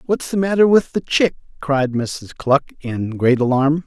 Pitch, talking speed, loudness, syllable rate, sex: 145 Hz, 185 wpm, -18 LUFS, 4.3 syllables/s, male